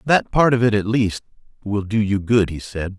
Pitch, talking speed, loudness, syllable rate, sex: 105 Hz, 240 wpm, -19 LUFS, 4.9 syllables/s, male